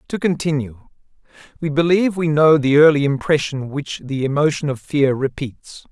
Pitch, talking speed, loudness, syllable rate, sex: 145 Hz, 150 wpm, -18 LUFS, 5.0 syllables/s, male